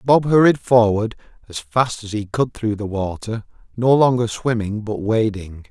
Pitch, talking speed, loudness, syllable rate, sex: 110 Hz, 170 wpm, -19 LUFS, 4.5 syllables/s, male